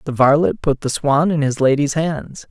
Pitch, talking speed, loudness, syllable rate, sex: 145 Hz, 215 wpm, -17 LUFS, 4.6 syllables/s, male